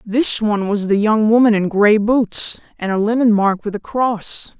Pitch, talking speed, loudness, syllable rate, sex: 215 Hz, 210 wpm, -16 LUFS, 4.6 syllables/s, female